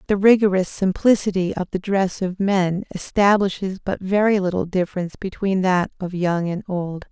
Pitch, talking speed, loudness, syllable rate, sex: 190 Hz, 160 wpm, -20 LUFS, 5.0 syllables/s, female